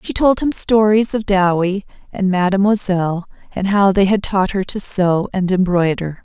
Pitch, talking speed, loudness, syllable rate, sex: 195 Hz, 175 wpm, -16 LUFS, 4.6 syllables/s, female